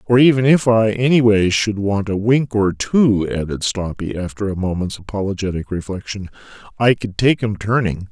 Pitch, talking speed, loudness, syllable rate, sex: 105 Hz, 180 wpm, -17 LUFS, 4.9 syllables/s, male